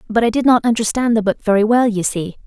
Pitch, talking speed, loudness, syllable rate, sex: 220 Hz, 270 wpm, -16 LUFS, 6.3 syllables/s, female